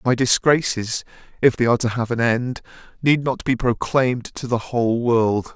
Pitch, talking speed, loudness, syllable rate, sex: 120 Hz, 185 wpm, -20 LUFS, 4.9 syllables/s, male